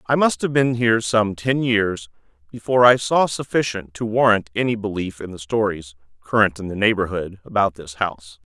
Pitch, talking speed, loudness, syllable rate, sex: 105 Hz, 185 wpm, -20 LUFS, 5.3 syllables/s, male